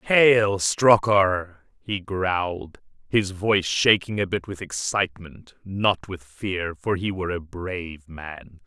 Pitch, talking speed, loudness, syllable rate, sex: 95 Hz, 140 wpm, -23 LUFS, 3.7 syllables/s, male